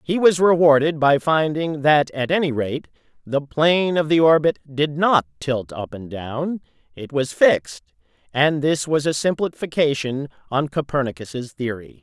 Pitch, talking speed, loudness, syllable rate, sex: 150 Hz, 155 wpm, -20 LUFS, 4.5 syllables/s, male